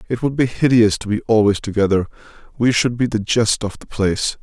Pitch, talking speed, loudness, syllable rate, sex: 110 Hz, 215 wpm, -18 LUFS, 5.6 syllables/s, male